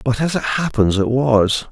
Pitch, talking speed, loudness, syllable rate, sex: 125 Hz, 210 wpm, -17 LUFS, 4.4 syllables/s, male